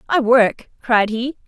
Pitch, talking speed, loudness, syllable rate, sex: 240 Hz, 165 wpm, -17 LUFS, 3.7 syllables/s, female